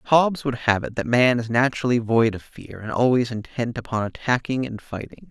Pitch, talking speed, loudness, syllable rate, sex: 120 Hz, 205 wpm, -22 LUFS, 5.3 syllables/s, male